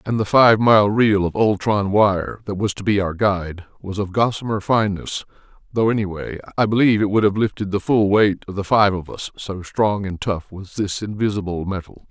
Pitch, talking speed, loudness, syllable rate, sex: 100 Hz, 210 wpm, -19 LUFS, 5.3 syllables/s, male